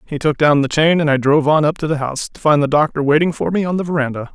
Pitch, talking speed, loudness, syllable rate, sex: 150 Hz, 320 wpm, -16 LUFS, 6.9 syllables/s, male